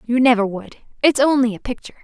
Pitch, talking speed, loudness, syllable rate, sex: 245 Hz, 205 wpm, -17 LUFS, 7.0 syllables/s, female